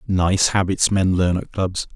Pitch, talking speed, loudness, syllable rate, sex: 95 Hz, 185 wpm, -19 LUFS, 4.0 syllables/s, male